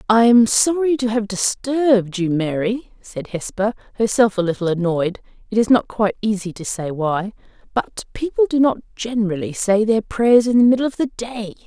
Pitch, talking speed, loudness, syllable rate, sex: 215 Hz, 185 wpm, -19 LUFS, 5.1 syllables/s, female